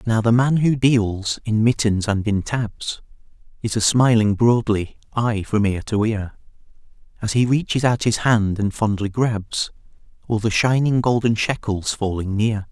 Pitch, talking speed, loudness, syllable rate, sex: 110 Hz, 160 wpm, -20 LUFS, 4.3 syllables/s, male